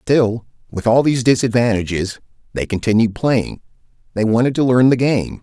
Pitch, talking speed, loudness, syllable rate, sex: 120 Hz, 145 wpm, -16 LUFS, 5.2 syllables/s, male